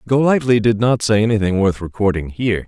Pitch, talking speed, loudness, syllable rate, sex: 110 Hz, 180 wpm, -16 LUFS, 6.0 syllables/s, male